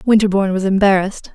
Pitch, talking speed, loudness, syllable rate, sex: 195 Hz, 135 wpm, -15 LUFS, 7.3 syllables/s, female